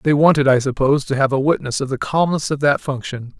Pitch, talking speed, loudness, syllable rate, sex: 140 Hz, 250 wpm, -17 LUFS, 6.2 syllables/s, male